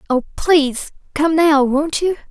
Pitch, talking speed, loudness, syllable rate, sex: 300 Hz, 155 wpm, -16 LUFS, 4.1 syllables/s, female